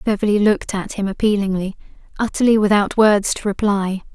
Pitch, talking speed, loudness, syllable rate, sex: 205 Hz, 145 wpm, -18 LUFS, 5.5 syllables/s, female